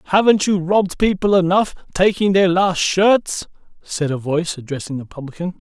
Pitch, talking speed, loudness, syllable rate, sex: 180 Hz, 150 wpm, -18 LUFS, 5.2 syllables/s, male